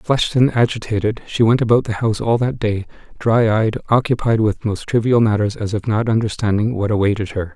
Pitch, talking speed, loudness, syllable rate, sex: 110 Hz, 200 wpm, -18 LUFS, 5.7 syllables/s, male